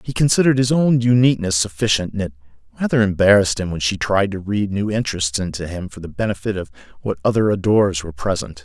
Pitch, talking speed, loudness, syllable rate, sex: 100 Hz, 200 wpm, -18 LUFS, 6.6 syllables/s, male